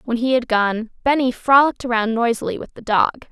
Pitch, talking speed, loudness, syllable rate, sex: 240 Hz, 200 wpm, -18 LUFS, 5.9 syllables/s, female